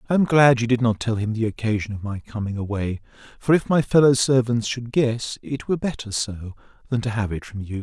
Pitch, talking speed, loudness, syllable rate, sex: 115 Hz, 255 wpm, -22 LUFS, 6.0 syllables/s, male